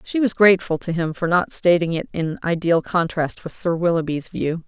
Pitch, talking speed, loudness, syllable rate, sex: 170 Hz, 205 wpm, -20 LUFS, 5.1 syllables/s, female